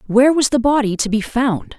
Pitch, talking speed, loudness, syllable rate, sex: 245 Hz, 235 wpm, -16 LUFS, 5.6 syllables/s, female